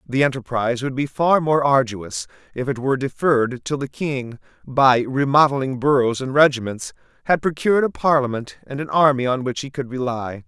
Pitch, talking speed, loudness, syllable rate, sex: 130 Hz, 180 wpm, -20 LUFS, 5.2 syllables/s, male